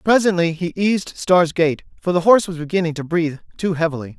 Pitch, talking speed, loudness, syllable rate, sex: 170 Hz, 200 wpm, -19 LUFS, 5.8 syllables/s, male